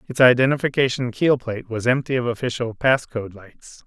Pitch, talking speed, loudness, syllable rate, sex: 125 Hz, 170 wpm, -20 LUFS, 5.4 syllables/s, male